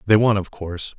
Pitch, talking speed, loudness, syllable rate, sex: 100 Hz, 245 wpm, -21 LUFS, 6.0 syllables/s, male